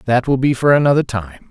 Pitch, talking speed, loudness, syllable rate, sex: 125 Hz, 240 wpm, -15 LUFS, 5.4 syllables/s, male